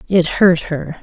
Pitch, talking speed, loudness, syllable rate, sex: 170 Hz, 175 wpm, -15 LUFS, 3.5 syllables/s, female